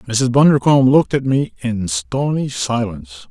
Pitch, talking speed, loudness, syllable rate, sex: 125 Hz, 145 wpm, -16 LUFS, 4.7 syllables/s, male